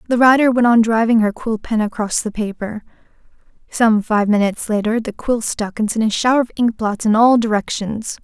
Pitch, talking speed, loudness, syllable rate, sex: 225 Hz, 205 wpm, -17 LUFS, 5.4 syllables/s, female